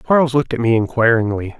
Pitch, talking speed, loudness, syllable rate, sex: 120 Hz, 190 wpm, -16 LUFS, 6.5 syllables/s, male